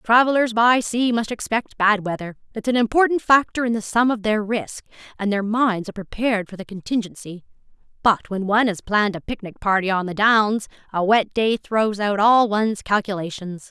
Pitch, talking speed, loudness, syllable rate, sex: 215 Hz, 195 wpm, -20 LUFS, 5.3 syllables/s, female